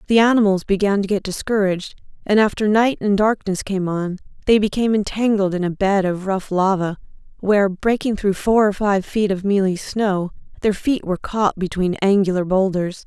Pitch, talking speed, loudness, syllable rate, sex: 200 Hz, 180 wpm, -19 LUFS, 5.2 syllables/s, female